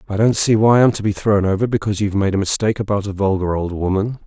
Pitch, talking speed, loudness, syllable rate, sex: 100 Hz, 265 wpm, -17 LUFS, 6.9 syllables/s, male